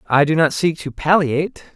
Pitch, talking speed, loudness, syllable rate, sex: 155 Hz, 205 wpm, -18 LUFS, 5.4 syllables/s, male